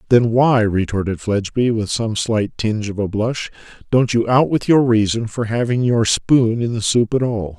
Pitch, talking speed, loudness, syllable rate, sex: 115 Hz, 205 wpm, -17 LUFS, 4.7 syllables/s, male